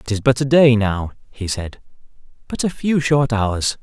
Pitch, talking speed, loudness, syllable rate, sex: 120 Hz, 205 wpm, -18 LUFS, 4.5 syllables/s, male